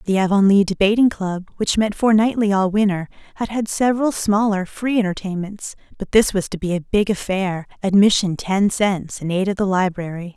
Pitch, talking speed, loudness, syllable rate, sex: 200 Hz, 180 wpm, -19 LUFS, 5.2 syllables/s, female